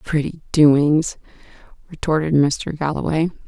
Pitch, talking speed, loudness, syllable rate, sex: 155 Hz, 85 wpm, -19 LUFS, 4.1 syllables/s, female